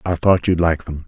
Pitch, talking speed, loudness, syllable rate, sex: 85 Hz, 280 wpm, -18 LUFS, 5.2 syllables/s, male